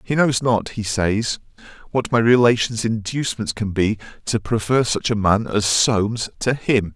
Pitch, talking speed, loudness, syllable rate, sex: 110 Hz, 175 wpm, -20 LUFS, 4.5 syllables/s, male